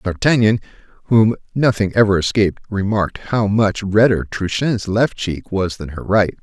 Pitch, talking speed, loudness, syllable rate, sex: 100 Hz, 150 wpm, -17 LUFS, 4.7 syllables/s, male